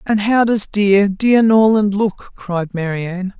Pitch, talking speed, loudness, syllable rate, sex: 200 Hz, 160 wpm, -15 LUFS, 3.7 syllables/s, female